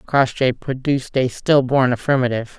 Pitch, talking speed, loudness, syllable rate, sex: 130 Hz, 140 wpm, -18 LUFS, 5.3 syllables/s, female